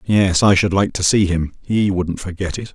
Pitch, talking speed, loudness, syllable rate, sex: 95 Hz, 240 wpm, -17 LUFS, 4.9 syllables/s, male